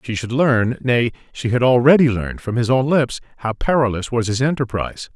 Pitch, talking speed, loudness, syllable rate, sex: 125 Hz, 175 wpm, -18 LUFS, 5.4 syllables/s, male